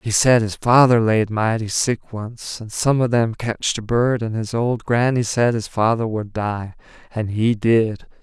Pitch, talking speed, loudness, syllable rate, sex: 115 Hz, 195 wpm, -19 LUFS, 4.2 syllables/s, male